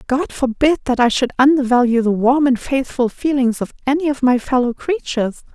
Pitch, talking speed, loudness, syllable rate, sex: 260 Hz, 185 wpm, -17 LUFS, 5.4 syllables/s, female